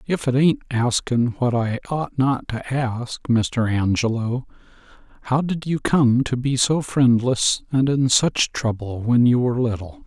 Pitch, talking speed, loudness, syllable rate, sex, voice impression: 125 Hz, 165 wpm, -20 LUFS, 4.0 syllables/s, male, masculine, slightly old, slightly thick, slightly muffled, slightly calm, slightly mature, slightly elegant